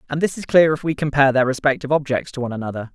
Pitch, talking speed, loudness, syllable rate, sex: 140 Hz, 265 wpm, -19 LUFS, 7.9 syllables/s, male